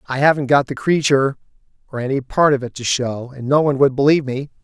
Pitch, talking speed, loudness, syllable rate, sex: 135 Hz, 235 wpm, -17 LUFS, 6.5 syllables/s, male